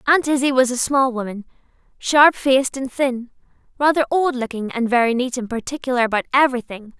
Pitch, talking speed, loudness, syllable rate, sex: 255 Hz, 170 wpm, -19 LUFS, 5.9 syllables/s, female